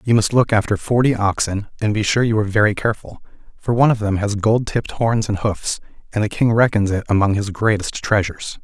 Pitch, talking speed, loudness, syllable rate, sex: 105 Hz, 220 wpm, -18 LUFS, 6.0 syllables/s, male